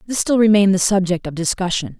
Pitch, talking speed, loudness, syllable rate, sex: 190 Hz, 210 wpm, -17 LUFS, 6.4 syllables/s, female